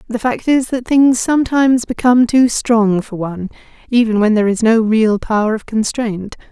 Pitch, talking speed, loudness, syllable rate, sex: 230 Hz, 185 wpm, -14 LUFS, 5.2 syllables/s, female